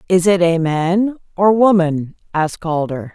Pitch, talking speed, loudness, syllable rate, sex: 175 Hz, 155 wpm, -16 LUFS, 4.2 syllables/s, female